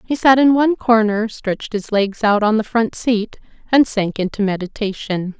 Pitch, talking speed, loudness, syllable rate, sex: 220 Hz, 190 wpm, -17 LUFS, 4.9 syllables/s, female